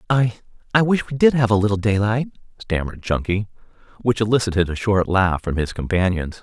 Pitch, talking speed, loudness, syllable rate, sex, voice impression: 105 Hz, 170 wpm, -20 LUFS, 5.6 syllables/s, male, masculine, adult-like, tensed, slightly powerful, clear, fluent, cool, intellectual, sincere, calm, friendly, reassuring, wild, lively, kind